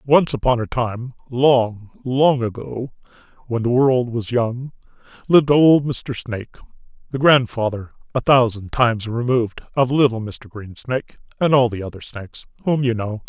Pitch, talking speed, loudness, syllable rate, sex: 120 Hz, 155 wpm, -19 LUFS, 4.7 syllables/s, male